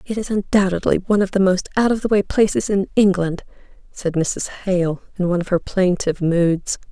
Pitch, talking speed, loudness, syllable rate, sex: 190 Hz, 200 wpm, -19 LUFS, 5.5 syllables/s, female